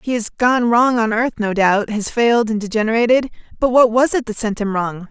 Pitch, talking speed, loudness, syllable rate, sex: 225 Hz, 225 wpm, -16 LUFS, 5.1 syllables/s, female